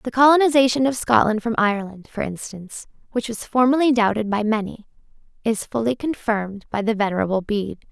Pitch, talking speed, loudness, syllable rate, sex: 225 Hz, 160 wpm, -20 LUFS, 5.9 syllables/s, female